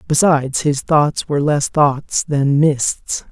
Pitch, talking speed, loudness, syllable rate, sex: 145 Hz, 145 wpm, -16 LUFS, 3.5 syllables/s, male